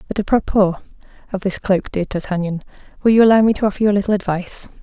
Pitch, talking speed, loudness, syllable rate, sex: 195 Hz, 225 wpm, -17 LUFS, 7.2 syllables/s, female